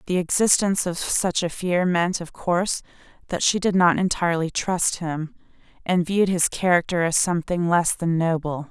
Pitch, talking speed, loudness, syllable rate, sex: 175 Hz, 170 wpm, -22 LUFS, 5.0 syllables/s, female